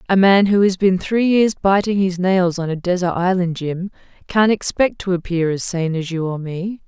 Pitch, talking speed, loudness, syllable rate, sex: 185 Hz, 220 wpm, -18 LUFS, 4.8 syllables/s, female